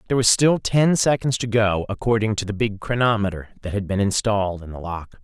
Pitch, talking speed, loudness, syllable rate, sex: 110 Hz, 220 wpm, -21 LUFS, 5.8 syllables/s, male